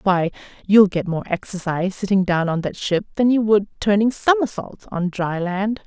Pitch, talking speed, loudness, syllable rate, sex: 195 Hz, 185 wpm, -20 LUFS, 4.9 syllables/s, female